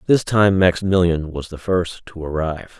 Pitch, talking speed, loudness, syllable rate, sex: 90 Hz, 170 wpm, -19 LUFS, 5.0 syllables/s, male